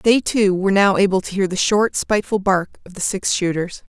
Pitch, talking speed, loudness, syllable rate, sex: 195 Hz, 230 wpm, -18 LUFS, 5.5 syllables/s, female